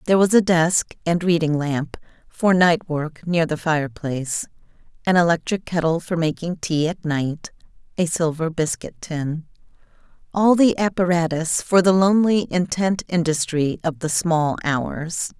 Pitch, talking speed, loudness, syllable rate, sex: 165 Hz, 145 wpm, -20 LUFS, 4.4 syllables/s, female